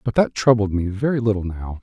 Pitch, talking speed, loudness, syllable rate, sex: 105 Hz, 230 wpm, -20 LUFS, 5.8 syllables/s, male